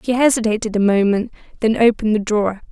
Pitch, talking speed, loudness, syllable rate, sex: 220 Hz, 175 wpm, -17 LUFS, 6.7 syllables/s, female